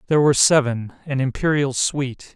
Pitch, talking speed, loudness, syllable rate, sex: 135 Hz, 130 wpm, -19 LUFS, 5.9 syllables/s, male